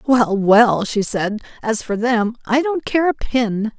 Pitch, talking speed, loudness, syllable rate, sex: 230 Hz, 190 wpm, -18 LUFS, 3.6 syllables/s, female